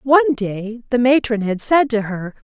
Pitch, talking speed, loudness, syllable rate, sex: 235 Hz, 190 wpm, -18 LUFS, 4.5 syllables/s, female